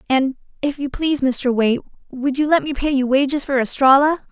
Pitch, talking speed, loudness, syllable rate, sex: 270 Hz, 210 wpm, -18 LUFS, 5.7 syllables/s, female